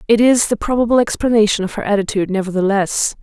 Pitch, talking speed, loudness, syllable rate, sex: 215 Hz, 165 wpm, -16 LUFS, 6.7 syllables/s, female